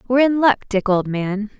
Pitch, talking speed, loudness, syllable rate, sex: 225 Hz, 225 wpm, -18 LUFS, 5.1 syllables/s, female